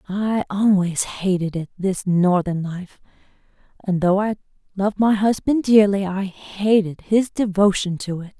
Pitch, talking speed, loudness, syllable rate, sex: 195 Hz, 130 wpm, -20 LUFS, 4.3 syllables/s, female